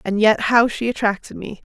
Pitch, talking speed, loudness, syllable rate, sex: 220 Hz, 210 wpm, -18 LUFS, 5.2 syllables/s, female